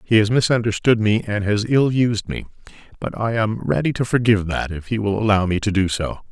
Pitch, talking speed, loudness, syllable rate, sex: 110 Hz, 230 wpm, -19 LUFS, 5.5 syllables/s, male